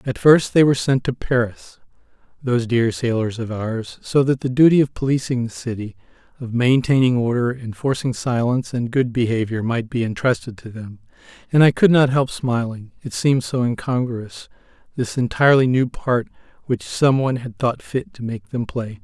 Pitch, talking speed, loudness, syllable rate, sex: 125 Hz, 175 wpm, -19 LUFS, 5.1 syllables/s, male